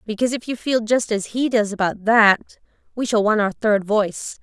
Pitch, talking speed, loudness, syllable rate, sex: 220 Hz, 215 wpm, -19 LUFS, 5.1 syllables/s, female